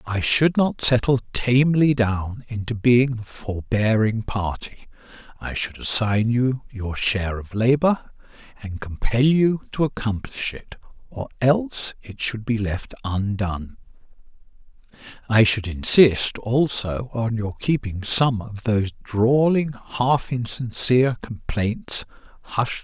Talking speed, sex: 135 wpm, male